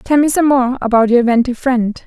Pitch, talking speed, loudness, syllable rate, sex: 250 Hz, 235 wpm, -13 LUFS, 6.1 syllables/s, female